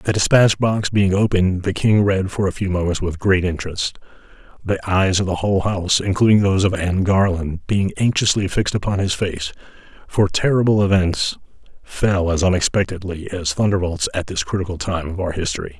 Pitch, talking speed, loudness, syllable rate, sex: 95 Hz, 180 wpm, -19 LUFS, 5.6 syllables/s, male